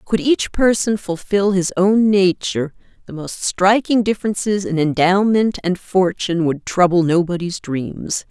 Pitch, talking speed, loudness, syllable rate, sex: 190 Hz, 135 wpm, -17 LUFS, 4.4 syllables/s, female